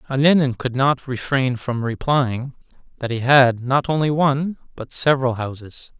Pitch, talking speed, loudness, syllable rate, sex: 130 Hz, 150 wpm, -19 LUFS, 4.7 syllables/s, male